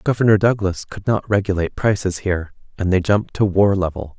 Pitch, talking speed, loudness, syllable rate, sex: 95 Hz, 185 wpm, -19 LUFS, 6.0 syllables/s, male